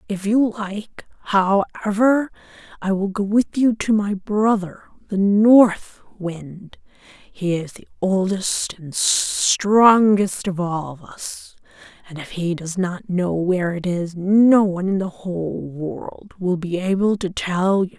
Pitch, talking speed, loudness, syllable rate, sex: 195 Hz, 155 wpm, -19 LUFS, 3.5 syllables/s, female